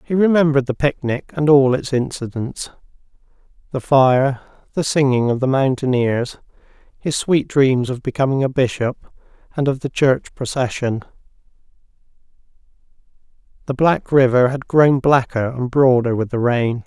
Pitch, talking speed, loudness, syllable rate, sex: 130 Hz, 135 wpm, -18 LUFS, 4.8 syllables/s, male